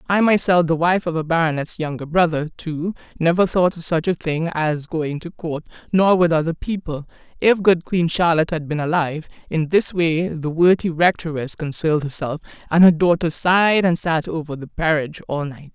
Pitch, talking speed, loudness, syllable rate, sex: 165 Hz, 185 wpm, -19 LUFS, 5.2 syllables/s, female